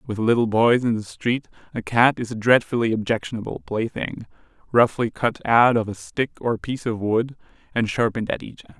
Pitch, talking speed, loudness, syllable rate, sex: 115 Hz, 190 wpm, -22 LUFS, 5.3 syllables/s, male